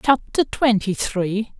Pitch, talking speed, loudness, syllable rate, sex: 215 Hz, 115 wpm, -20 LUFS, 3.4 syllables/s, female